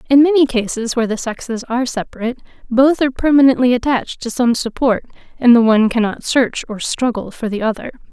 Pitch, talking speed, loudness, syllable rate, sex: 240 Hz, 185 wpm, -16 LUFS, 6.2 syllables/s, female